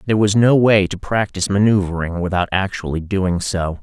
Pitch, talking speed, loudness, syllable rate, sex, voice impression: 95 Hz, 175 wpm, -17 LUFS, 5.5 syllables/s, male, masculine, adult-like, fluent, intellectual